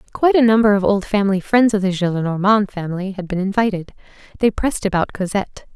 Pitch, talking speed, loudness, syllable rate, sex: 200 Hz, 190 wpm, -18 LUFS, 6.6 syllables/s, female